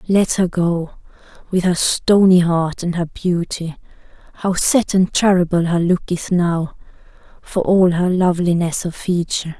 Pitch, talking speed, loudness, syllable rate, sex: 175 Hz, 140 wpm, -17 LUFS, 4.4 syllables/s, female